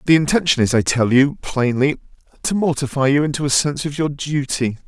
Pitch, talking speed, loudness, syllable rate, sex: 140 Hz, 195 wpm, -18 LUFS, 5.7 syllables/s, male